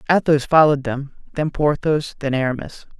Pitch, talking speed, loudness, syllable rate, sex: 145 Hz, 140 wpm, -19 LUFS, 5.4 syllables/s, male